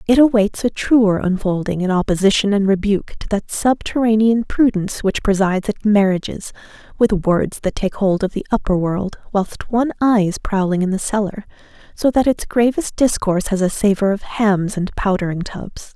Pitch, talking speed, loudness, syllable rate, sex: 205 Hz, 175 wpm, -18 LUFS, 5.1 syllables/s, female